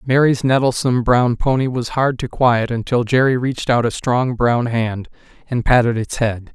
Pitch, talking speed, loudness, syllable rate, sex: 120 Hz, 185 wpm, -17 LUFS, 4.8 syllables/s, male